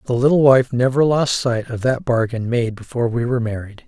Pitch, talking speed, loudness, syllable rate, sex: 125 Hz, 215 wpm, -18 LUFS, 5.7 syllables/s, male